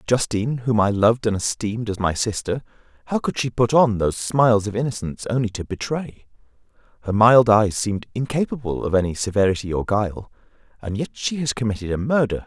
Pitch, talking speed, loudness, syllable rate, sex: 110 Hz, 185 wpm, -21 LUFS, 6.0 syllables/s, male